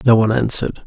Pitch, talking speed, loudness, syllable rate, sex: 115 Hz, 210 wpm, -16 LUFS, 7.8 syllables/s, male